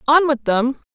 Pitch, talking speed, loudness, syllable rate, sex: 270 Hz, 190 wpm, -18 LUFS, 4.3 syllables/s, female